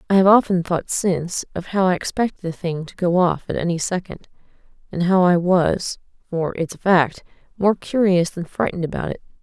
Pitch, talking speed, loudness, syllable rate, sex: 180 Hz, 185 wpm, -20 LUFS, 5.4 syllables/s, female